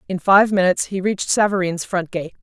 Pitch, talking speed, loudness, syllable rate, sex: 190 Hz, 200 wpm, -18 LUFS, 5.9 syllables/s, female